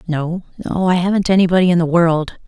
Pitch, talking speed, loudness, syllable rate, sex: 175 Hz, 170 wpm, -16 LUFS, 5.9 syllables/s, female